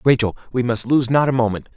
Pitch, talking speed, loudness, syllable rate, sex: 125 Hz, 240 wpm, -19 LUFS, 6.2 syllables/s, male